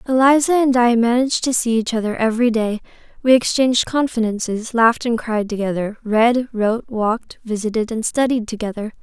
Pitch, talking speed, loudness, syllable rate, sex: 230 Hz, 160 wpm, -18 LUFS, 5.6 syllables/s, female